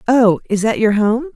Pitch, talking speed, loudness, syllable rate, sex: 230 Hz, 220 wpm, -15 LUFS, 4.9 syllables/s, female